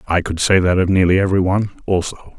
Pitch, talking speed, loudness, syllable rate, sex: 95 Hz, 225 wpm, -16 LUFS, 6.9 syllables/s, male